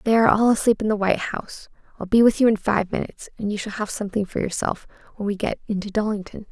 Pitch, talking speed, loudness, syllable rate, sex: 210 Hz, 250 wpm, -22 LUFS, 7.0 syllables/s, female